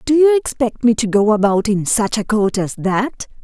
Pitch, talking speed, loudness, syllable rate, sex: 225 Hz, 225 wpm, -16 LUFS, 4.7 syllables/s, female